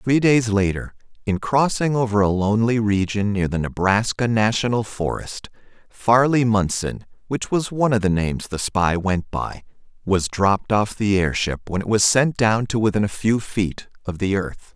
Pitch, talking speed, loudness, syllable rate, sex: 105 Hz, 180 wpm, -20 LUFS, 4.7 syllables/s, male